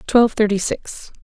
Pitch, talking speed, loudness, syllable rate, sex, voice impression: 215 Hz, 145 wpm, -18 LUFS, 5.0 syllables/s, female, feminine, adult-like, slightly muffled, slightly fluent, slightly intellectual, slightly calm, slightly elegant, slightly sweet